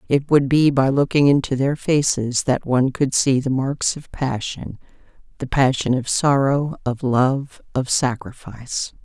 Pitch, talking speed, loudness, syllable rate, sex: 135 Hz, 155 wpm, -19 LUFS, 4.3 syllables/s, female